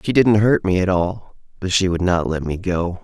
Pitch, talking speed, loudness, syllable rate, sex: 95 Hz, 255 wpm, -18 LUFS, 4.8 syllables/s, male